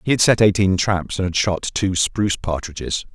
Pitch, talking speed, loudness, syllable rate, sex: 95 Hz, 210 wpm, -19 LUFS, 5.0 syllables/s, male